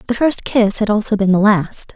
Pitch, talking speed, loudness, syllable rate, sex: 215 Hz, 245 wpm, -15 LUFS, 5.1 syllables/s, female